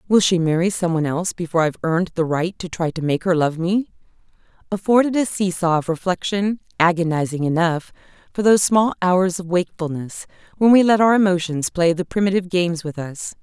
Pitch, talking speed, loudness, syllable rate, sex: 180 Hz, 190 wpm, -19 LUFS, 6.0 syllables/s, female